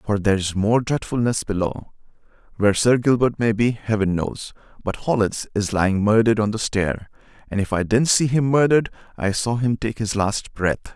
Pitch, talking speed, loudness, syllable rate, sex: 110 Hz, 180 wpm, -21 LUFS, 5.2 syllables/s, male